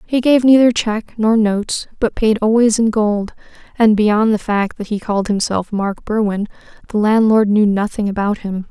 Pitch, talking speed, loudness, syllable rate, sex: 215 Hz, 185 wpm, -16 LUFS, 4.9 syllables/s, female